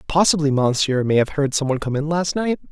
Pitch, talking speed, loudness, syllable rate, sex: 150 Hz, 245 wpm, -19 LUFS, 6.1 syllables/s, male